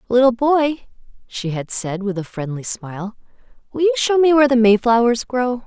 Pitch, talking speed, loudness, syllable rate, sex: 235 Hz, 180 wpm, -17 LUFS, 5.1 syllables/s, female